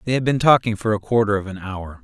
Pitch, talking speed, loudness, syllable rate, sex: 110 Hz, 295 wpm, -19 LUFS, 6.3 syllables/s, male